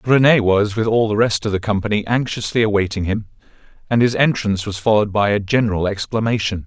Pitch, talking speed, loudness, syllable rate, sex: 105 Hz, 190 wpm, -18 LUFS, 6.2 syllables/s, male